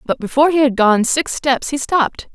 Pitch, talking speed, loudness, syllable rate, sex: 270 Hz, 230 wpm, -16 LUFS, 5.4 syllables/s, female